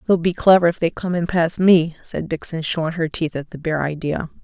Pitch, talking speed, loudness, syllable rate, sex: 165 Hz, 245 wpm, -19 LUFS, 5.4 syllables/s, female